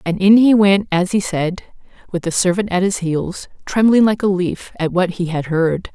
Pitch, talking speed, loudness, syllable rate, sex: 185 Hz, 220 wpm, -16 LUFS, 4.7 syllables/s, female